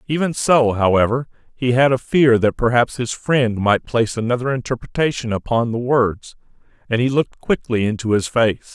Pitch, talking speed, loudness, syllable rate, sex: 120 Hz, 170 wpm, -18 LUFS, 5.1 syllables/s, male